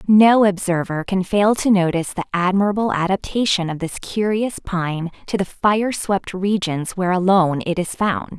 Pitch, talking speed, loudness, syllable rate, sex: 190 Hz, 165 wpm, -19 LUFS, 4.9 syllables/s, female